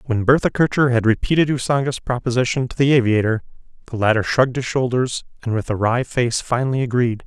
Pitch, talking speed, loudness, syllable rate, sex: 125 Hz, 180 wpm, -19 LUFS, 6.1 syllables/s, male